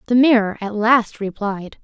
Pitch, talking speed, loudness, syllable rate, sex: 220 Hz, 165 wpm, -18 LUFS, 4.4 syllables/s, female